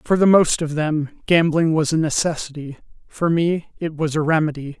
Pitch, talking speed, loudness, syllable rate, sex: 160 Hz, 190 wpm, -19 LUFS, 4.9 syllables/s, male